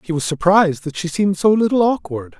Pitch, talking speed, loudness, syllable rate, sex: 180 Hz, 225 wpm, -17 LUFS, 6.1 syllables/s, male